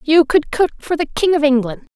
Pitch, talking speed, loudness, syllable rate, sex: 300 Hz, 245 wpm, -16 LUFS, 5.2 syllables/s, female